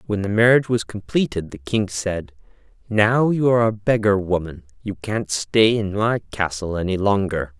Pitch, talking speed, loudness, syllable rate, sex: 100 Hz, 175 wpm, -20 LUFS, 4.8 syllables/s, male